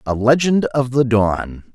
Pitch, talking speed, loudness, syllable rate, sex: 120 Hz, 170 wpm, -17 LUFS, 3.9 syllables/s, male